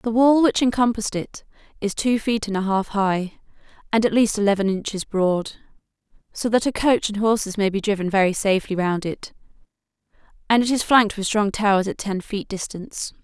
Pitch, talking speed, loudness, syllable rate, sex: 210 Hz, 190 wpm, -21 LUFS, 5.5 syllables/s, female